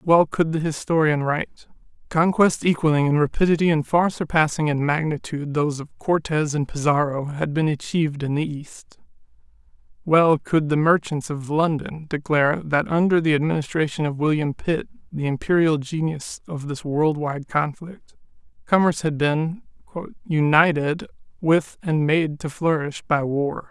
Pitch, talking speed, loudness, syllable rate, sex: 155 Hz, 145 wpm, -21 LUFS, 4.8 syllables/s, male